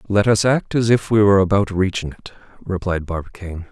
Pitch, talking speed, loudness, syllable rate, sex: 100 Hz, 195 wpm, -18 LUFS, 5.9 syllables/s, male